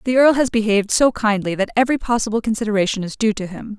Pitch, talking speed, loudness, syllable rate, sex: 220 Hz, 220 wpm, -18 LUFS, 6.9 syllables/s, female